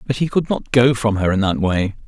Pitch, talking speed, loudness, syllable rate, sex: 115 Hz, 290 wpm, -18 LUFS, 5.4 syllables/s, male